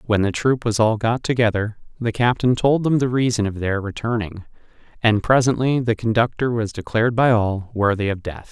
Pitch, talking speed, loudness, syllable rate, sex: 115 Hz, 190 wpm, -20 LUFS, 5.3 syllables/s, male